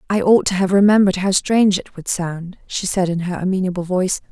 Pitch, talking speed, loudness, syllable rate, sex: 190 Hz, 220 wpm, -17 LUFS, 6.0 syllables/s, female